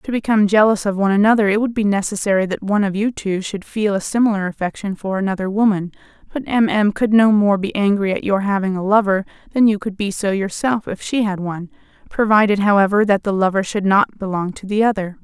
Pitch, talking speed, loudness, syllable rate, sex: 200 Hz, 225 wpm, -17 LUFS, 6.1 syllables/s, female